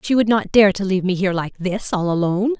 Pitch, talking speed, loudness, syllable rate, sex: 195 Hz, 275 wpm, -18 LUFS, 6.5 syllables/s, female